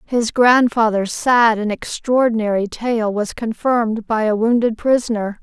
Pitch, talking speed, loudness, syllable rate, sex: 225 Hz, 135 wpm, -17 LUFS, 4.3 syllables/s, female